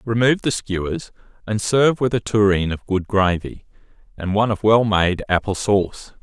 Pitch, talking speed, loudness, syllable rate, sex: 105 Hz, 175 wpm, -19 LUFS, 5.2 syllables/s, male